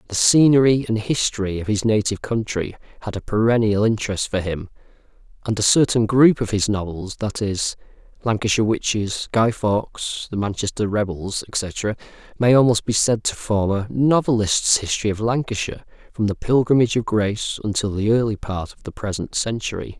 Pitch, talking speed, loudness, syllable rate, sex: 110 Hz, 160 wpm, -20 LUFS, 5.4 syllables/s, male